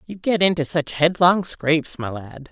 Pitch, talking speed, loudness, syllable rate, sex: 160 Hz, 190 wpm, -20 LUFS, 4.6 syllables/s, female